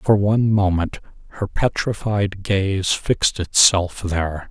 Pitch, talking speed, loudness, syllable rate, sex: 95 Hz, 120 wpm, -19 LUFS, 3.9 syllables/s, male